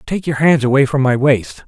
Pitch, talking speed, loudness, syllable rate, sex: 135 Hz, 250 wpm, -14 LUFS, 5.2 syllables/s, male